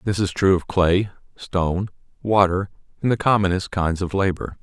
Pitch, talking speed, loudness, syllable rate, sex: 95 Hz, 170 wpm, -21 LUFS, 5.1 syllables/s, male